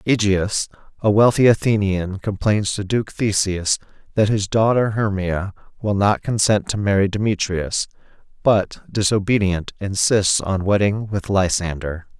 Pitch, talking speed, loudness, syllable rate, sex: 100 Hz, 125 wpm, -19 LUFS, 4.3 syllables/s, male